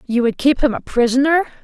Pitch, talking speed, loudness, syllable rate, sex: 260 Hz, 220 wpm, -16 LUFS, 5.8 syllables/s, female